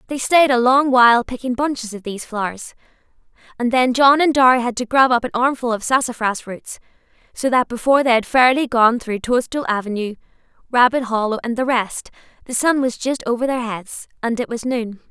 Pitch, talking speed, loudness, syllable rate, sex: 245 Hz, 200 wpm, -18 LUFS, 5.5 syllables/s, female